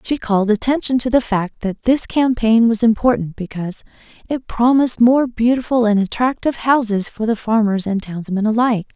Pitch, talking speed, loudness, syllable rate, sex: 225 Hz, 170 wpm, -17 LUFS, 5.4 syllables/s, female